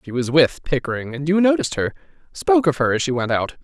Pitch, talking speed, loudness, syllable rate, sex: 145 Hz, 230 wpm, -19 LUFS, 6.6 syllables/s, male